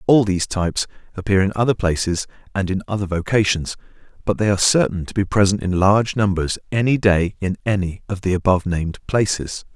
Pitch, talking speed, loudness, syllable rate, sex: 95 Hz, 185 wpm, -19 LUFS, 6.1 syllables/s, male